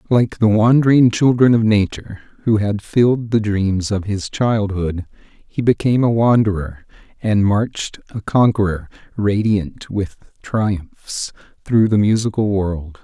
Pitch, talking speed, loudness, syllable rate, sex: 105 Hz, 135 wpm, -17 LUFS, 4.1 syllables/s, male